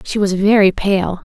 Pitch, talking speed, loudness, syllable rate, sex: 195 Hz, 185 wpm, -15 LUFS, 4.4 syllables/s, female